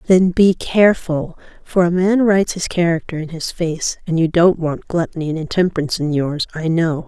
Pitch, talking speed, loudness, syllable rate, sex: 170 Hz, 195 wpm, -17 LUFS, 5.3 syllables/s, female